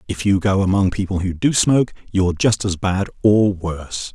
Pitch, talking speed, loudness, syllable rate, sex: 95 Hz, 205 wpm, -18 LUFS, 5.2 syllables/s, male